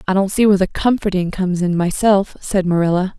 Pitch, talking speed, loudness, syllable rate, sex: 190 Hz, 205 wpm, -17 LUFS, 6.0 syllables/s, female